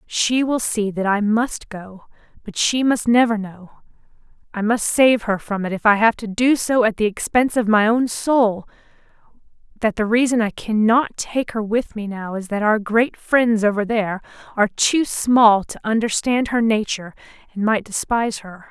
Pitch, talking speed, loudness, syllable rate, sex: 220 Hz, 185 wpm, -19 LUFS, 4.7 syllables/s, female